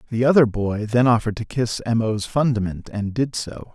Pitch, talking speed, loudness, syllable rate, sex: 115 Hz, 210 wpm, -21 LUFS, 5.2 syllables/s, male